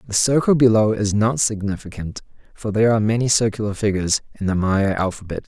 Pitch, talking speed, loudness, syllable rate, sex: 105 Hz, 175 wpm, -19 LUFS, 6.3 syllables/s, male